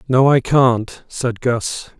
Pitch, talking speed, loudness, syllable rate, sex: 125 Hz, 150 wpm, -17 LUFS, 2.9 syllables/s, male